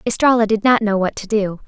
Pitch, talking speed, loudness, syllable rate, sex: 215 Hz, 250 wpm, -17 LUFS, 5.9 syllables/s, female